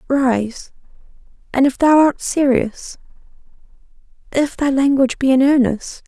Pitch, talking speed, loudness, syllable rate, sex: 265 Hz, 120 wpm, -16 LUFS, 4.3 syllables/s, female